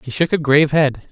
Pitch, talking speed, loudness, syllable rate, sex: 145 Hz, 270 wpm, -16 LUFS, 5.9 syllables/s, male